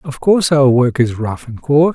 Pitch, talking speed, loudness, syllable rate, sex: 135 Hz, 245 wpm, -14 LUFS, 5.1 syllables/s, male